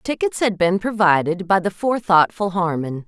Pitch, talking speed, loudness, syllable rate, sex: 190 Hz, 155 wpm, -19 LUFS, 5.0 syllables/s, female